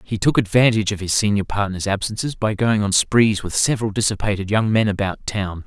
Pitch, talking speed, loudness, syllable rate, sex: 105 Hz, 200 wpm, -19 LUFS, 5.8 syllables/s, male